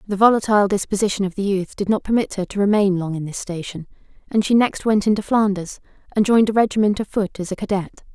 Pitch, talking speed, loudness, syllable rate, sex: 200 Hz, 230 wpm, -19 LUFS, 6.4 syllables/s, female